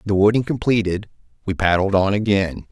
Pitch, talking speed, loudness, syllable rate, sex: 100 Hz, 155 wpm, -19 LUFS, 5.4 syllables/s, male